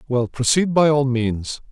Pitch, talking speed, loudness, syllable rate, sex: 130 Hz, 175 wpm, -19 LUFS, 4.1 syllables/s, male